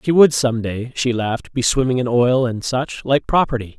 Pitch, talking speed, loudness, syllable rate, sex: 125 Hz, 220 wpm, -18 LUFS, 5.0 syllables/s, male